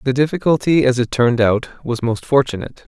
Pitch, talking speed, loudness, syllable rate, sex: 130 Hz, 185 wpm, -17 LUFS, 5.8 syllables/s, male